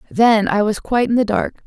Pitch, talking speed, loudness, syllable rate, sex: 220 Hz, 250 wpm, -17 LUFS, 5.8 syllables/s, female